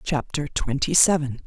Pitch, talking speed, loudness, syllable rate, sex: 145 Hz, 125 wpm, -22 LUFS, 4.5 syllables/s, female